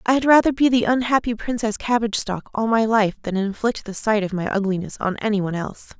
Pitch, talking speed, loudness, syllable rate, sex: 220 Hz, 220 wpm, -21 LUFS, 6.1 syllables/s, female